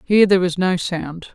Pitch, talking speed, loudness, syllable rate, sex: 180 Hz, 225 wpm, -18 LUFS, 5.9 syllables/s, female